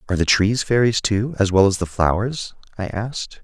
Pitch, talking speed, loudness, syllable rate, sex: 105 Hz, 210 wpm, -19 LUFS, 5.4 syllables/s, male